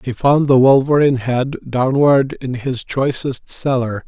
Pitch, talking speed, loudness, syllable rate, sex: 130 Hz, 145 wpm, -16 LUFS, 4.1 syllables/s, male